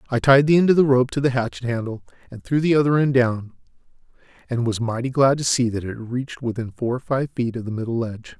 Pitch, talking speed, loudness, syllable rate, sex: 125 Hz, 250 wpm, -21 LUFS, 6.2 syllables/s, male